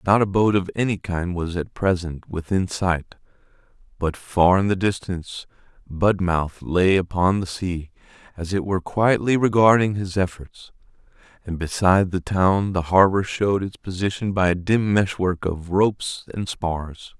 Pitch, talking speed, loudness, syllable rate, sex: 95 Hz, 155 wpm, -21 LUFS, 4.5 syllables/s, male